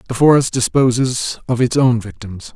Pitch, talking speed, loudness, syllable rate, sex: 120 Hz, 165 wpm, -15 LUFS, 4.8 syllables/s, male